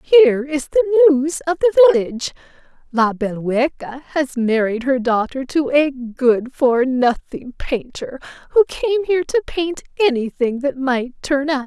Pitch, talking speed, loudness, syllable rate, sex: 280 Hz, 150 wpm, -18 LUFS, 4.3 syllables/s, female